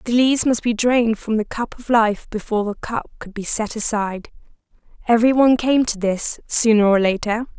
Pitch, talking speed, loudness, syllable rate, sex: 225 Hz, 200 wpm, -18 LUFS, 5.5 syllables/s, female